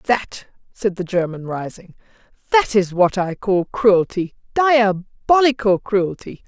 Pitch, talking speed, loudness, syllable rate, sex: 205 Hz, 110 wpm, -18 LUFS, 3.7 syllables/s, female